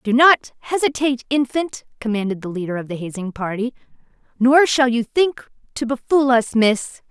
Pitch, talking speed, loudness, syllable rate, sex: 245 Hz, 160 wpm, -19 LUFS, 5.0 syllables/s, female